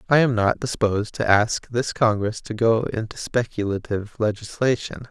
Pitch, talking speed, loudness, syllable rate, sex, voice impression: 110 Hz, 155 wpm, -22 LUFS, 4.9 syllables/s, male, very masculine, very adult-like, slightly middle-aged, very thick, tensed, slightly powerful, slightly dark, hard, slightly muffled, fluent, very cool, very intellectual, refreshing, sincere, very calm, very mature, friendly, reassuring, slightly unique, elegant, slightly sweet, slightly lively, kind, slightly modest